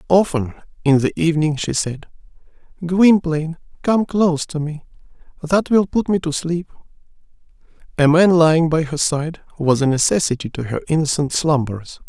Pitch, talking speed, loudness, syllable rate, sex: 160 Hz, 150 wpm, -18 LUFS, 5.1 syllables/s, male